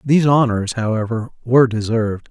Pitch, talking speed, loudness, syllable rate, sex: 120 Hz, 130 wpm, -17 LUFS, 5.8 syllables/s, male